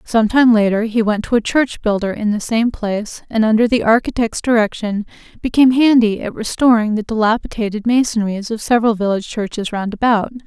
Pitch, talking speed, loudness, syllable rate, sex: 220 Hz, 180 wpm, -16 LUFS, 5.7 syllables/s, female